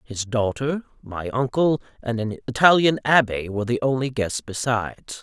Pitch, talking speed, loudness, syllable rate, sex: 120 Hz, 150 wpm, -22 LUFS, 4.9 syllables/s, male